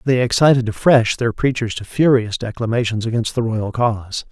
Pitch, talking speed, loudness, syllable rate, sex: 115 Hz, 165 wpm, -18 LUFS, 5.3 syllables/s, male